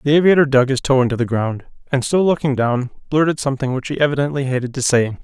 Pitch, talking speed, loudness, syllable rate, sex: 135 Hz, 230 wpm, -17 LUFS, 6.6 syllables/s, male